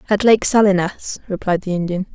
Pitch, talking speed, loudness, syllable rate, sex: 195 Hz, 170 wpm, -17 LUFS, 5.5 syllables/s, female